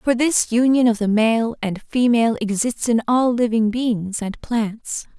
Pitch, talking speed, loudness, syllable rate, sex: 230 Hz, 175 wpm, -19 LUFS, 4.1 syllables/s, female